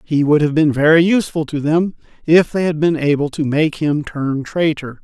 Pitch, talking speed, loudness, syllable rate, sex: 155 Hz, 215 wpm, -16 LUFS, 5.0 syllables/s, male